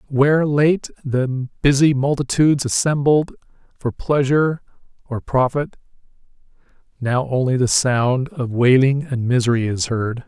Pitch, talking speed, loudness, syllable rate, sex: 135 Hz, 115 wpm, -18 LUFS, 4.3 syllables/s, male